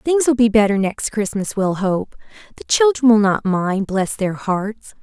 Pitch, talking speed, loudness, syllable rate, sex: 215 Hz, 190 wpm, -17 LUFS, 4.2 syllables/s, female